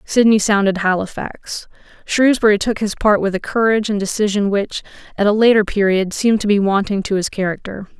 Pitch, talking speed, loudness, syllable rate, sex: 205 Hz, 180 wpm, -16 LUFS, 5.6 syllables/s, female